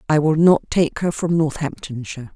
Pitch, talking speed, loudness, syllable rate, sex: 155 Hz, 180 wpm, -19 LUFS, 5.1 syllables/s, female